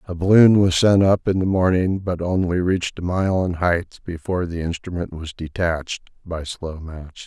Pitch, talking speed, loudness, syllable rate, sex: 90 Hz, 190 wpm, -20 LUFS, 4.9 syllables/s, male